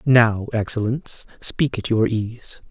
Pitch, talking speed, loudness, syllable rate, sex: 115 Hz, 135 wpm, -21 LUFS, 3.8 syllables/s, male